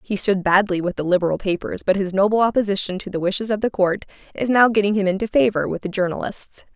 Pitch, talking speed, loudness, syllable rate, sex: 200 Hz, 230 wpm, -20 LUFS, 6.4 syllables/s, female